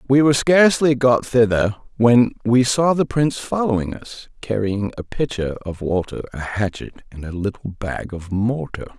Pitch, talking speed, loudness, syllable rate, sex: 115 Hz, 165 wpm, -19 LUFS, 4.8 syllables/s, male